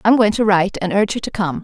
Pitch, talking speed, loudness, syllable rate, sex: 200 Hz, 330 wpm, -17 LUFS, 7.2 syllables/s, female